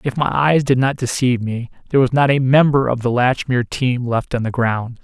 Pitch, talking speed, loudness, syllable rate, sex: 125 Hz, 240 wpm, -17 LUFS, 5.5 syllables/s, male